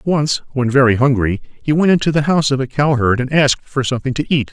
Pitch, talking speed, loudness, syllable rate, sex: 135 Hz, 240 wpm, -16 LUFS, 6.4 syllables/s, male